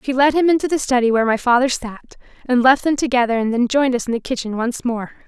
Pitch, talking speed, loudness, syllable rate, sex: 250 Hz, 260 wpm, -17 LUFS, 6.5 syllables/s, female